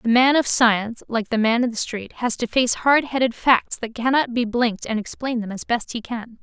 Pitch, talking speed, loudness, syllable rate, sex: 235 Hz, 245 wpm, -21 LUFS, 5.1 syllables/s, female